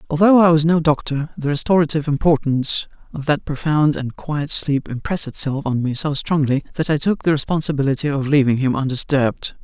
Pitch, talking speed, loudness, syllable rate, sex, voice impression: 145 Hz, 180 wpm, -18 LUFS, 5.8 syllables/s, male, very masculine, slightly old, very thick, relaxed, powerful, dark, very soft, very muffled, halting, very raspy, very cool, intellectual, sincere, very calm, very mature, very friendly, reassuring, very unique, slightly elegant, very wild, sweet, lively, kind, modest